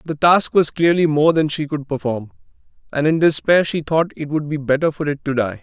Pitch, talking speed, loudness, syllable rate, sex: 150 Hz, 235 wpm, -18 LUFS, 5.3 syllables/s, male